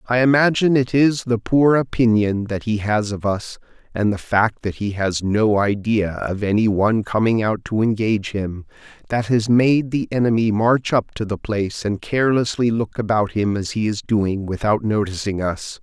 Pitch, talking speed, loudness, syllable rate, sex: 110 Hz, 190 wpm, -19 LUFS, 4.8 syllables/s, male